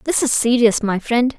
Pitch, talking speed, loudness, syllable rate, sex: 235 Hz, 215 wpm, -17 LUFS, 4.8 syllables/s, female